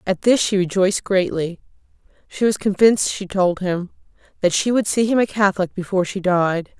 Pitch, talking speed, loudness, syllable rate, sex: 190 Hz, 185 wpm, -19 LUFS, 5.4 syllables/s, female